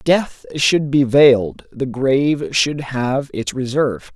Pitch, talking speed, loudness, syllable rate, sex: 135 Hz, 145 wpm, -17 LUFS, 3.6 syllables/s, male